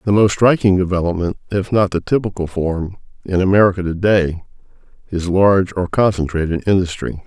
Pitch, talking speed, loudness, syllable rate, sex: 95 Hz, 150 wpm, -17 LUFS, 5.5 syllables/s, male